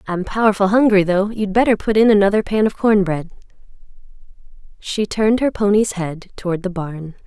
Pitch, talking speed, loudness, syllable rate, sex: 200 Hz, 175 wpm, -17 LUFS, 5.4 syllables/s, female